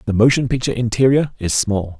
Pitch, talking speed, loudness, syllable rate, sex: 115 Hz, 180 wpm, -17 LUFS, 6.1 syllables/s, male